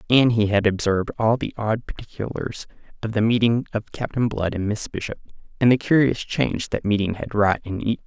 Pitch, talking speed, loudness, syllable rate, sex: 110 Hz, 200 wpm, -22 LUFS, 5.5 syllables/s, male